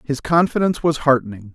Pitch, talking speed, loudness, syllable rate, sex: 140 Hz, 155 wpm, -18 LUFS, 6.2 syllables/s, male